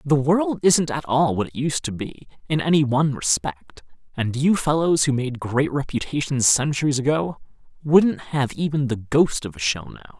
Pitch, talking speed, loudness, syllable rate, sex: 135 Hz, 190 wpm, -21 LUFS, 4.8 syllables/s, male